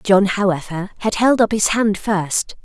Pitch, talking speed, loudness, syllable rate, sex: 200 Hz, 180 wpm, -18 LUFS, 4.4 syllables/s, female